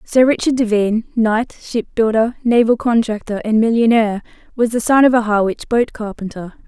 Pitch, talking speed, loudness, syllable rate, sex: 225 Hz, 155 wpm, -16 LUFS, 5.2 syllables/s, female